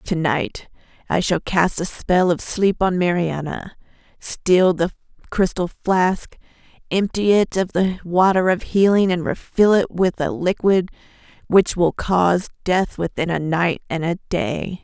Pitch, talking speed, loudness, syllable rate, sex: 180 Hz, 155 wpm, -19 LUFS, 4.0 syllables/s, female